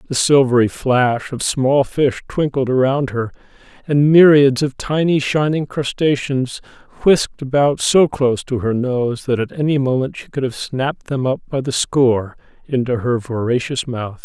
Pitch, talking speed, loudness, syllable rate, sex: 130 Hz, 165 wpm, -17 LUFS, 4.6 syllables/s, male